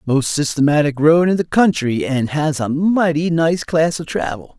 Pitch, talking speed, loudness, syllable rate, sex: 155 Hz, 185 wpm, -17 LUFS, 4.5 syllables/s, male